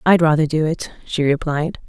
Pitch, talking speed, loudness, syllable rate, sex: 155 Hz, 190 wpm, -19 LUFS, 5.0 syllables/s, female